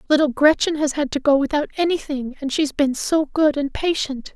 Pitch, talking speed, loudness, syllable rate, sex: 290 Hz, 220 wpm, -20 LUFS, 5.5 syllables/s, female